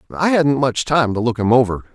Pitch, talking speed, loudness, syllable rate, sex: 130 Hz, 245 wpm, -17 LUFS, 5.6 syllables/s, male